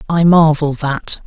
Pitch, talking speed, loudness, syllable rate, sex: 155 Hz, 140 wpm, -13 LUFS, 3.7 syllables/s, male